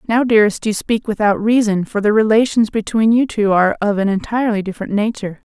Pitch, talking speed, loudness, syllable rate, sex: 215 Hz, 195 wpm, -16 LUFS, 6.3 syllables/s, female